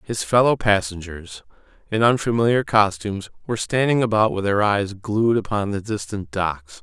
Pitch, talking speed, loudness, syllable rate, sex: 105 Hz, 150 wpm, -20 LUFS, 4.9 syllables/s, male